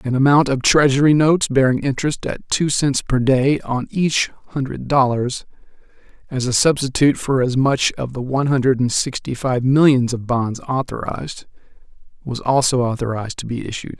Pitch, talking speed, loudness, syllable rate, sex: 130 Hz, 165 wpm, -18 LUFS, 5.2 syllables/s, male